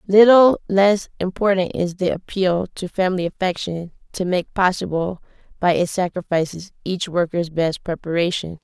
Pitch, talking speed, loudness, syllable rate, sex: 180 Hz, 130 wpm, -20 LUFS, 4.8 syllables/s, female